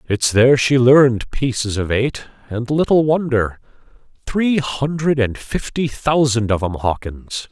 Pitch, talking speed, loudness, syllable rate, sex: 125 Hz, 145 wpm, -17 LUFS, 4.2 syllables/s, male